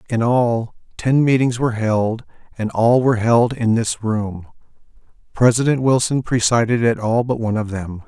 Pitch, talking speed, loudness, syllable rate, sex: 115 Hz, 165 wpm, -18 LUFS, 4.8 syllables/s, male